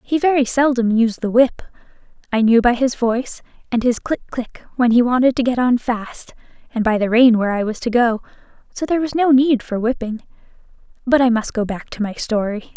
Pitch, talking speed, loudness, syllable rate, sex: 240 Hz, 215 wpm, -18 LUFS, 5.5 syllables/s, female